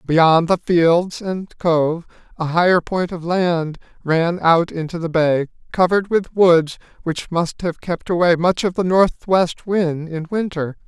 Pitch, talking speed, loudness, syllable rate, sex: 170 Hz, 165 wpm, -18 LUFS, 3.9 syllables/s, male